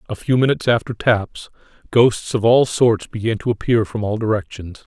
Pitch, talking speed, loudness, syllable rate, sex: 110 Hz, 180 wpm, -18 LUFS, 5.1 syllables/s, male